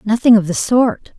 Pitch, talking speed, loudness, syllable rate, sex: 220 Hz, 205 wpm, -14 LUFS, 4.7 syllables/s, female